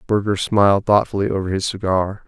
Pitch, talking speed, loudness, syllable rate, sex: 100 Hz, 160 wpm, -18 LUFS, 5.6 syllables/s, male